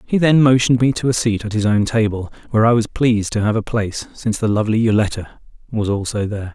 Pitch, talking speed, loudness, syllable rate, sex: 110 Hz, 240 wpm, -17 LUFS, 6.6 syllables/s, male